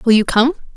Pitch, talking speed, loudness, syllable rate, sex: 240 Hz, 235 wpm, -15 LUFS, 6.3 syllables/s, female